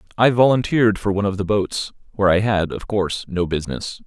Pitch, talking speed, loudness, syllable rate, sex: 100 Hz, 205 wpm, -19 LUFS, 6.3 syllables/s, male